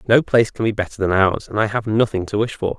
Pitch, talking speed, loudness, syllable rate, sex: 105 Hz, 300 wpm, -19 LUFS, 6.5 syllables/s, male